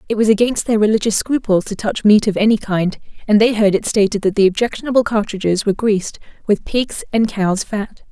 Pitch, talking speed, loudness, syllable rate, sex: 210 Hz, 205 wpm, -16 LUFS, 5.8 syllables/s, female